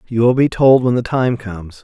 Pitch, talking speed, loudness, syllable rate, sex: 120 Hz, 260 wpm, -15 LUFS, 5.3 syllables/s, male